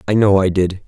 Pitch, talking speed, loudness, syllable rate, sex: 95 Hz, 275 wpm, -15 LUFS, 5.7 syllables/s, male